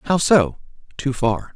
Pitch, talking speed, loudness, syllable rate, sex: 130 Hz, 115 wpm, -19 LUFS, 3.5 syllables/s, male